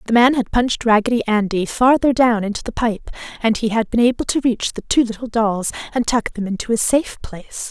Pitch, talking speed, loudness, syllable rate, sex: 230 Hz, 225 wpm, -18 LUFS, 5.7 syllables/s, female